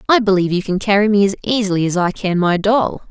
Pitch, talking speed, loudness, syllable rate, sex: 200 Hz, 250 wpm, -16 LUFS, 6.5 syllables/s, female